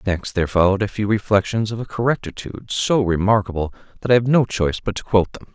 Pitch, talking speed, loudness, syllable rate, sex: 105 Hz, 215 wpm, -20 LUFS, 6.8 syllables/s, male